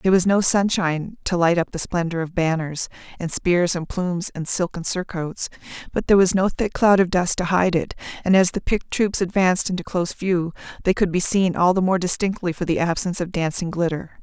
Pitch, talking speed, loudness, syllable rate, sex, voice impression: 180 Hz, 220 wpm, -21 LUFS, 5.7 syllables/s, female, slightly feminine, adult-like, fluent, calm, slightly unique